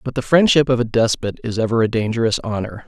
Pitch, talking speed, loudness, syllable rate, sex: 115 Hz, 230 wpm, -18 LUFS, 6.3 syllables/s, male